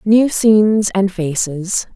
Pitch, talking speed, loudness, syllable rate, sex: 200 Hz, 125 wpm, -15 LUFS, 3.4 syllables/s, female